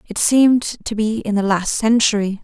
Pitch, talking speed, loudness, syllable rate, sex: 215 Hz, 195 wpm, -17 LUFS, 5.0 syllables/s, female